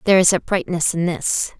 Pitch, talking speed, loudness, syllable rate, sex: 175 Hz, 190 wpm, -18 LUFS, 5.7 syllables/s, female